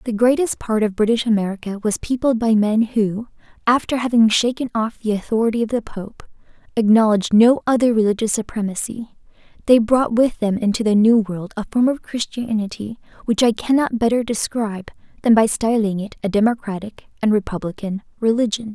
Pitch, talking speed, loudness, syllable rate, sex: 220 Hz, 165 wpm, -19 LUFS, 5.6 syllables/s, female